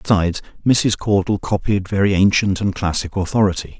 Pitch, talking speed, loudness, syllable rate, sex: 100 Hz, 140 wpm, -18 LUFS, 5.5 syllables/s, male